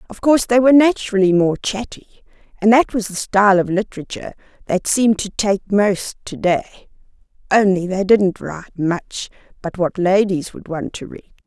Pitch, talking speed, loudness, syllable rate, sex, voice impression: 200 Hz, 175 wpm, -17 LUFS, 5.3 syllables/s, female, feminine, slightly old, tensed, powerful, muffled, halting, slightly friendly, lively, strict, slightly intense, slightly sharp